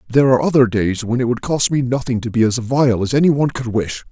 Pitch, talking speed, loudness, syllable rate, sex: 125 Hz, 265 wpm, -17 LUFS, 6.2 syllables/s, male